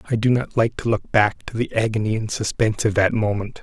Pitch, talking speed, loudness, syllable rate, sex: 110 Hz, 250 wpm, -21 LUFS, 5.9 syllables/s, male